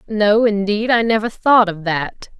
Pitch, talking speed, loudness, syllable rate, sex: 210 Hz, 175 wpm, -16 LUFS, 4.2 syllables/s, female